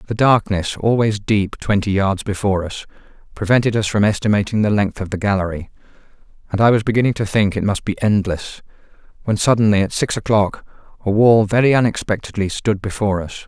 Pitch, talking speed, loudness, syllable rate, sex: 105 Hz, 175 wpm, -18 LUFS, 5.9 syllables/s, male